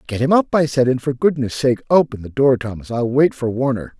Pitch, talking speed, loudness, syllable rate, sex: 130 Hz, 255 wpm, -18 LUFS, 5.6 syllables/s, male